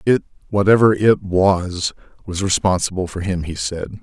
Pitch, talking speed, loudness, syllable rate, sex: 95 Hz, 120 wpm, -18 LUFS, 4.5 syllables/s, male